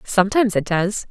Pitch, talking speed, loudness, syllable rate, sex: 200 Hz, 160 wpm, -19 LUFS, 6.0 syllables/s, female